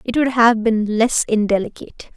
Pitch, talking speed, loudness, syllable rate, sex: 225 Hz, 165 wpm, -17 LUFS, 5.1 syllables/s, female